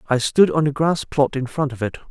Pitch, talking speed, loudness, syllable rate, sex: 140 Hz, 285 wpm, -19 LUFS, 5.5 syllables/s, male